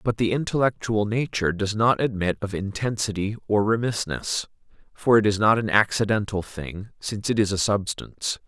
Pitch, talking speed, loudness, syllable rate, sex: 105 Hz, 165 wpm, -24 LUFS, 5.2 syllables/s, male